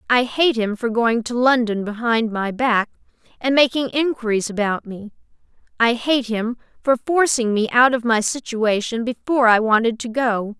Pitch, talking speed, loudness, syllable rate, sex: 235 Hz, 170 wpm, -19 LUFS, 4.7 syllables/s, female